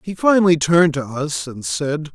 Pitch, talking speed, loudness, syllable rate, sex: 160 Hz, 195 wpm, -18 LUFS, 4.9 syllables/s, male